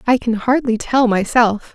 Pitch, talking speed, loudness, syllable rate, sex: 235 Hz, 170 wpm, -16 LUFS, 4.4 syllables/s, female